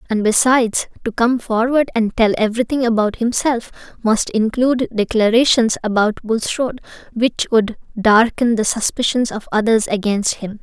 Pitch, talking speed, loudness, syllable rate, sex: 225 Hz, 135 wpm, -17 LUFS, 4.9 syllables/s, female